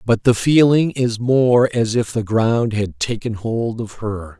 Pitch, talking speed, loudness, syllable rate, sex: 115 Hz, 190 wpm, -18 LUFS, 3.8 syllables/s, male